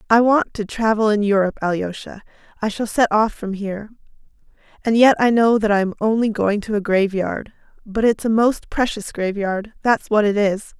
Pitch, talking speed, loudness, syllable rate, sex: 210 Hz, 195 wpm, -19 LUFS, 5.1 syllables/s, female